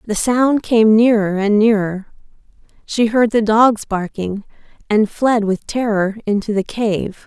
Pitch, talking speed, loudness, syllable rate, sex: 215 Hz, 150 wpm, -16 LUFS, 3.9 syllables/s, female